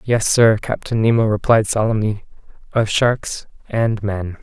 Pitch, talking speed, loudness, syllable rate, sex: 110 Hz, 135 wpm, -18 LUFS, 4.1 syllables/s, male